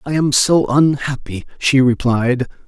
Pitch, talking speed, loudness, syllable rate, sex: 135 Hz, 135 wpm, -15 LUFS, 4.0 syllables/s, male